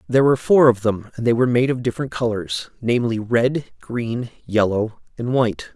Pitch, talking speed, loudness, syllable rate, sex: 120 Hz, 190 wpm, -20 LUFS, 5.6 syllables/s, male